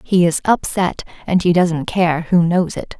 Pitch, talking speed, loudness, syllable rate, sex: 175 Hz, 200 wpm, -17 LUFS, 4.2 syllables/s, female